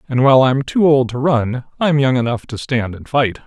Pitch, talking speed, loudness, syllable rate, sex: 130 Hz, 240 wpm, -16 LUFS, 5.1 syllables/s, male